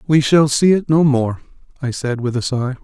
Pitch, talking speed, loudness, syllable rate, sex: 135 Hz, 235 wpm, -16 LUFS, 4.9 syllables/s, male